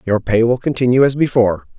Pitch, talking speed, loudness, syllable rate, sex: 120 Hz, 200 wpm, -15 LUFS, 6.3 syllables/s, male